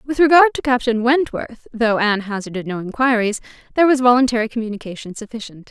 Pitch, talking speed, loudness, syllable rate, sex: 235 Hz, 160 wpm, -17 LUFS, 6.3 syllables/s, female